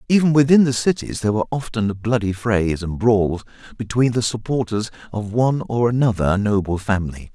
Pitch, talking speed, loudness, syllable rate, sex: 110 Hz, 165 wpm, -19 LUFS, 5.5 syllables/s, male